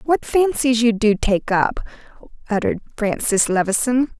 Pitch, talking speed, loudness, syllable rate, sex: 230 Hz, 130 wpm, -19 LUFS, 4.7 syllables/s, female